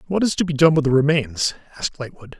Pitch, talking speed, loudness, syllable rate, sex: 145 Hz, 250 wpm, -19 LUFS, 6.6 syllables/s, male